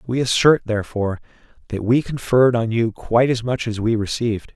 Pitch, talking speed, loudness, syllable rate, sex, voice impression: 115 Hz, 185 wpm, -19 LUFS, 6.0 syllables/s, male, masculine, adult-like, tensed, slightly bright, soft, clear, fluent, cool, intellectual, sincere, calm, friendly, reassuring, wild, kind